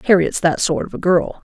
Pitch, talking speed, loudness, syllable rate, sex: 180 Hz, 235 wpm, -17 LUFS, 5.4 syllables/s, female